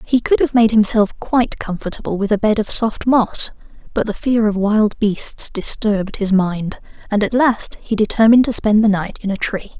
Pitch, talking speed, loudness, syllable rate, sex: 215 Hz, 210 wpm, -17 LUFS, 4.9 syllables/s, female